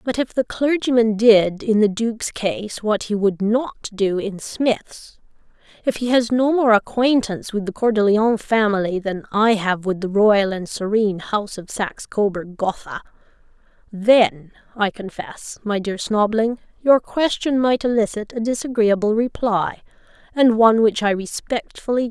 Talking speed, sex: 160 wpm, female